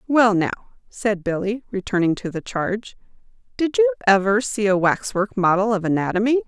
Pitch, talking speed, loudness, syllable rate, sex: 205 Hz, 160 wpm, -20 LUFS, 5.3 syllables/s, female